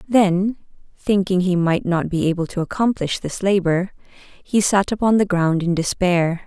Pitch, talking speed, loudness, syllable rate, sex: 185 Hz, 165 wpm, -19 LUFS, 4.4 syllables/s, female